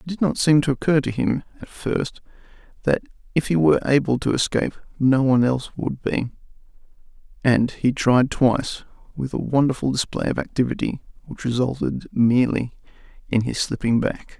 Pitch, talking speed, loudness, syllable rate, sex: 135 Hz, 165 wpm, -21 LUFS, 5.4 syllables/s, male